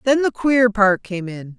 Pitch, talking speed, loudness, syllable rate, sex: 220 Hz, 230 wpm, -18 LUFS, 4.1 syllables/s, female